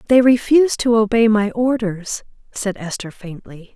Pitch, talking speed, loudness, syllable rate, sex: 220 Hz, 145 wpm, -17 LUFS, 4.6 syllables/s, female